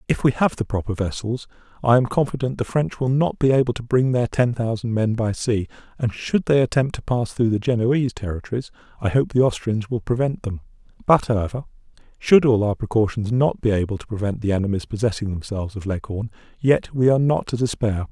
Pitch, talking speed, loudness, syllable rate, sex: 115 Hz, 210 wpm, -21 LUFS, 5.8 syllables/s, male